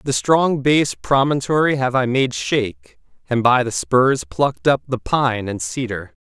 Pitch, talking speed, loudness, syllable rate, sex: 125 Hz, 175 wpm, -18 LUFS, 4.4 syllables/s, male